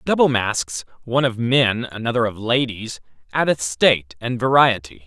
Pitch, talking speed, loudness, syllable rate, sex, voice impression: 115 Hz, 140 wpm, -19 LUFS, 5.0 syllables/s, male, masculine, adult-like, tensed, bright, clear, fluent, intellectual, friendly, slightly unique, wild, lively, intense, light